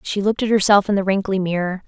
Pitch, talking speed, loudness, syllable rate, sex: 195 Hz, 255 wpm, -18 LUFS, 6.8 syllables/s, female